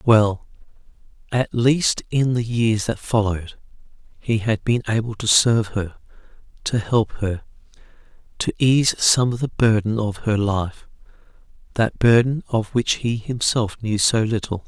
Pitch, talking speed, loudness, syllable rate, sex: 110 Hz, 145 wpm, -20 LUFS, 4.2 syllables/s, male